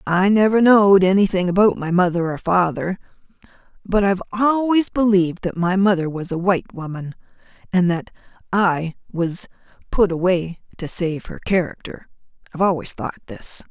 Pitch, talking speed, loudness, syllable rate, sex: 185 Hz, 160 wpm, -19 LUFS, 5.2 syllables/s, female